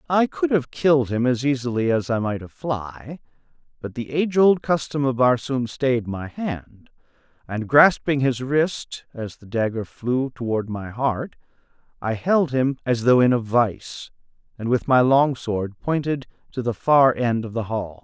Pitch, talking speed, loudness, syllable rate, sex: 125 Hz, 180 wpm, -22 LUFS, 4.2 syllables/s, male